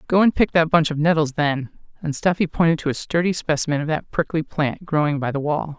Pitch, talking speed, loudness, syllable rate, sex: 155 Hz, 240 wpm, -21 LUFS, 5.8 syllables/s, female